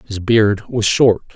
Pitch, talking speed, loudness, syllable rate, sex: 110 Hz, 175 wpm, -15 LUFS, 3.9 syllables/s, male